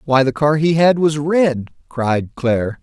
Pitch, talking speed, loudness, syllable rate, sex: 145 Hz, 190 wpm, -16 LUFS, 4.0 syllables/s, male